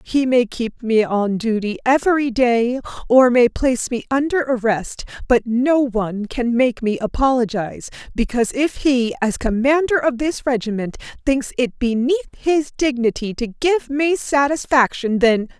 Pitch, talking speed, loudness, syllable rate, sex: 250 Hz, 150 wpm, -18 LUFS, 4.5 syllables/s, female